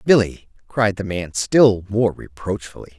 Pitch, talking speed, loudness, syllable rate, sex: 100 Hz, 140 wpm, -19 LUFS, 4.3 syllables/s, male